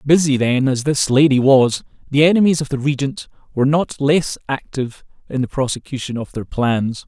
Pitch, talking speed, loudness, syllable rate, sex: 140 Hz, 180 wpm, -17 LUFS, 5.2 syllables/s, male